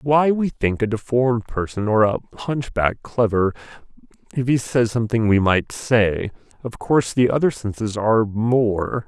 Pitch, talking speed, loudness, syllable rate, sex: 115 Hz, 160 wpm, -20 LUFS, 4.5 syllables/s, male